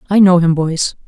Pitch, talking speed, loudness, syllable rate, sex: 175 Hz, 225 wpm, -13 LUFS, 5.1 syllables/s, female